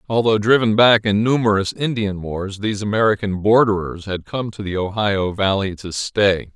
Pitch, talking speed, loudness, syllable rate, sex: 105 Hz, 165 wpm, -18 LUFS, 4.9 syllables/s, male